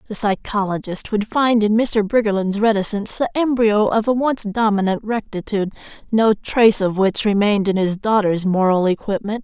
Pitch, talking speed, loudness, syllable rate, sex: 210 Hz, 160 wpm, -18 LUFS, 5.2 syllables/s, female